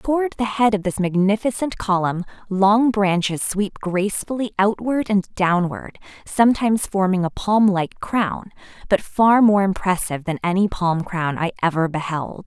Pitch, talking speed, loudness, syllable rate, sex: 195 Hz, 150 wpm, -20 LUFS, 4.6 syllables/s, female